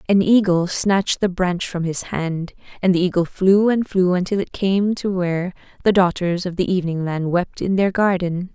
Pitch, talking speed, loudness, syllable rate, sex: 185 Hz, 205 wpm, -19 LUFS, 4.9 syllables/s, female